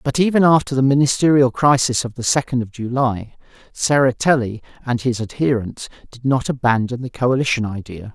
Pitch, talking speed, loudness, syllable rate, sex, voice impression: 125 Hz, 155 wpm, -18 LUFS, 5.5 syllables/s, male, masculine, adult-like, refreshing, slightly unique